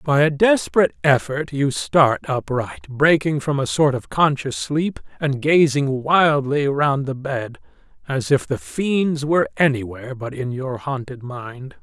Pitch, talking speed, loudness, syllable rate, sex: 140 Hz, 155 wpm, -20 LUFS, 4.2 syllables/s, male